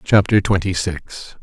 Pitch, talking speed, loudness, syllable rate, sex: 95 Hz, 125 wpm, -18 LUFS, 4.7 syllables/s, male